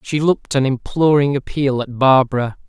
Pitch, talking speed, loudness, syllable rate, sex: 135 Hz, 155 wpm, -17 LUFS, 5.2 syllables/s, male